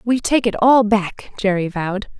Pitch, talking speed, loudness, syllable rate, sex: 210 Hz, 190 wpm, -17 LUFS, 4.6 syllables/s, female